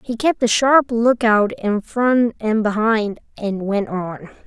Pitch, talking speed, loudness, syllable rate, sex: 225 Hz, 160 wpm, -18 LUFS, 3.7 syllables/s, female